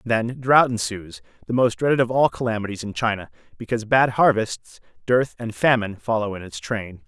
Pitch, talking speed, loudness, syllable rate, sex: 115 Hz, 180 wpm, -21 LUFS, 5.4 syllables/s, male